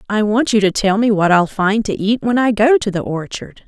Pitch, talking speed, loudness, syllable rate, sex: 210 Hz, 280 wpm, -15 LUFS, 5.2 syllables/s, female